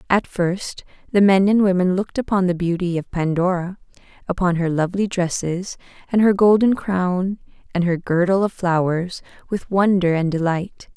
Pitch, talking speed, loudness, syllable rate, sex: 185 Hz, 160 wpm, -19 LUFS, 4.9 syllables/s, female